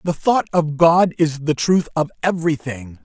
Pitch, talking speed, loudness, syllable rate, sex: 160 Hz, 180 wpm, -18 LUFS, 4.6 syllables/s, male